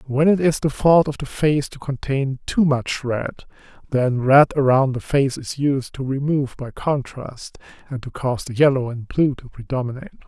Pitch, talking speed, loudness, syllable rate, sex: 135 Hz, 195 wpm, -20 LUFS, 4.9 syllables/s, male